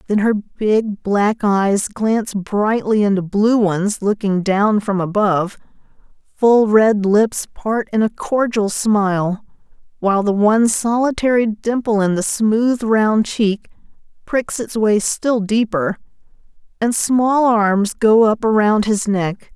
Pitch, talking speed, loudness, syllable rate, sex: 215 Hz, 140 wpm, -16 LUFS, 3.7 syllables/s, female